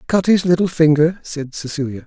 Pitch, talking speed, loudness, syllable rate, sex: 160 Hz, 175 wpm, -17 LUFS, 5.3 syllables/s, male